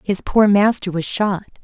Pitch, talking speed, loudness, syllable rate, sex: 195 Hz, 185 wpm, -17 LUFS, 4.4 syllables/s, female